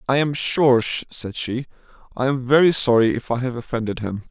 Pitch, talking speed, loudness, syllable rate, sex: 125 Hz, 195 wpm, -20 LUFS, 5.5 syllables/s, male